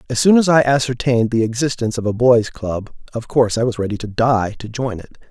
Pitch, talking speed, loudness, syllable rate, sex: 120 Hz, 235 wpm, -17 LUFS, 6.2 syllables/s, male